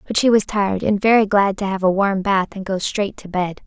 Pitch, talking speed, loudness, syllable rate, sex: 200 Hz, 280 wpm, -18 LUFS, 5.5 syllables/s, female